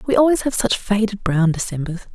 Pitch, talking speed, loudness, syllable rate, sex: 205 Hz, 195 wpm, -19 LUFS, 5.9 syllables/s, female